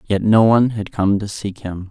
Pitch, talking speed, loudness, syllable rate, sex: 105 Hz, 250 wpm, -17 LUFS, 5.0 syllables/s, male